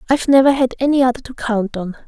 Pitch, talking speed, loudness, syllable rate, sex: 250 Hz, 230 wpm, -16 LUFS, 6.9 syllables/s, female